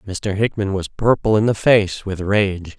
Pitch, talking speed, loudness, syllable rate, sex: 100 Hz, 195 wpm, -18 LUFS, 4.2 syllables/s, male